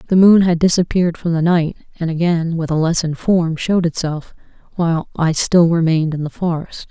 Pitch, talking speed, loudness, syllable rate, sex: 165 Hz, 190 wpm, -16 LUFS, 5.7 syllables/s, female